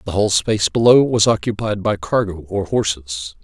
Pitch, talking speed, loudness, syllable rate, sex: 100 Hz, 175 wpm, -17 LUFS, 5.2 syllables/s, male